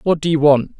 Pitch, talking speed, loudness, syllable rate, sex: 155 Hz, 300 wpm, -15 LUFS, 5.9 syllables/s, male